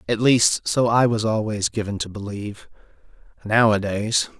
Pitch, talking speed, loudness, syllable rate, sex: 110 Hz, 125 wpm, -20 LUFS, 4.7 syllables/s, male